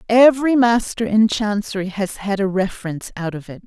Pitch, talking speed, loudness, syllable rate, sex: 210 Hz, 180 wpm, -18 LUFS, 5.5 syllables/s, female